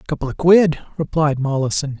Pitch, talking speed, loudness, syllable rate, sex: 150 Hz, 150 wpm, -17 LUFS, 5.4 syllables/s, male